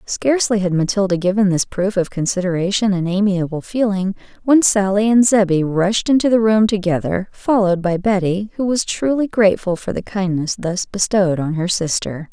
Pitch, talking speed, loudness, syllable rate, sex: 195 Hz, 170 wpm, -17 LUFS, 5.3 syllables/s, female